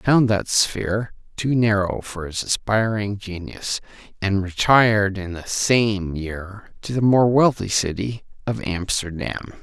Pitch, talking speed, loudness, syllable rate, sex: 105 Hz, 145 wpm, -21 LUFS, 4.1 syllables/s, male